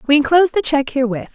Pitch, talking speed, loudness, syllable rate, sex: 290 Hz, 225 wpm, -16 LUFS, 7.7 syllables/s, female